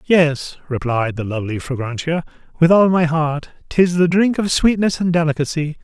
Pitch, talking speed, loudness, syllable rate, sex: 160 Hz, 165 wpm, -17 LUFS, 5.0 syllables/s, male